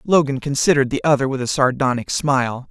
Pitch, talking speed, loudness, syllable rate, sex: 135 Hz, 175 wpm, -18 LUFS, 6.2 syllables/s, male